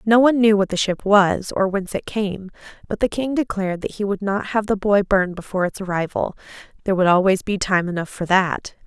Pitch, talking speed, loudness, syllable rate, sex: 195 Hz, 230 wpm, -20 LUFS, 6.0 syllables/s, female